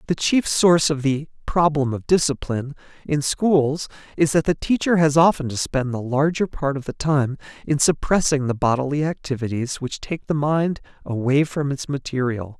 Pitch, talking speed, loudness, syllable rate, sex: 145 Hz, 175 wpm, -21 LUFS, 4.9 syllables/s, male